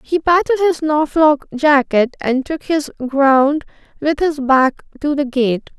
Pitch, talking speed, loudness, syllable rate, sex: 290 Hz, 155 wpm, -16 LUFS, 3.9 syllables/s, female